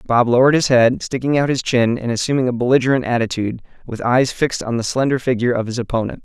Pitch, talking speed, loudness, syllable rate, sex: 125 Hz, 220 wpm, -17 LUFS, 6.8 syllables/s, male